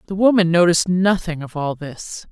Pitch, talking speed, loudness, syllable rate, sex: 175 Hz, 180 wpm, -17 LUFS, 5.2 syllables/s, female